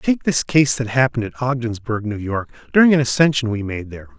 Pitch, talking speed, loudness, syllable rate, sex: 120 Hz, 215 wpm, -18 LUFS, 5.9 syllables/s, male